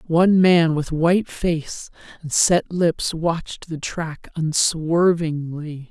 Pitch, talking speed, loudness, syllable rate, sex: 165 Hz, 120 wpm, -20 LUFS, 3.4 syllables/s, female